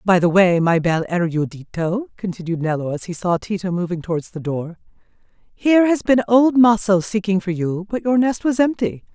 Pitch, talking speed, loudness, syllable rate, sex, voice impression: 195 Hz, 190 wpm, -19 LUFS, 5.2 syllables/s, female, feminine, middle-aged, slightly powerful, clear, fluent, intellectual, calm, elegant, slightly lively, slightly strict, slightly sharp